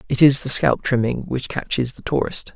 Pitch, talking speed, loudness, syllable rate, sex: 130 Hz, 210 wpm, -20 LUFS, 5.1 syllables/s, male